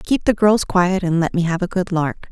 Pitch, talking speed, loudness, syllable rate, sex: 180 Hz, 285 wpm, -18 LUFS, 5.1 syllables/s, female